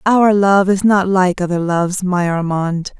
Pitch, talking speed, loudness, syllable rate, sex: 185 Hz, 180 wpm, -15 LUFS, 4.2 syllables/s, female